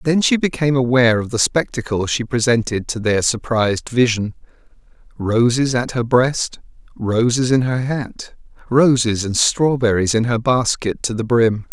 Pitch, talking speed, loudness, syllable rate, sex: 120 Hz, 155 wpm, -17 LUFS, 4.7 syllables/s, male